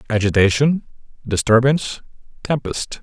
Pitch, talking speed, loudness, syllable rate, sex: 120 Hz, 60 wpm, -18 LUFS, 4.8 syllables/s, male